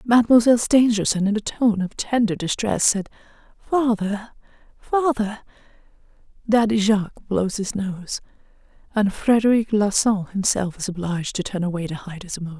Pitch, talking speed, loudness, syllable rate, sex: 210 Hz, 135 wpm, -21 LUFS, 5.4 syllables/s, female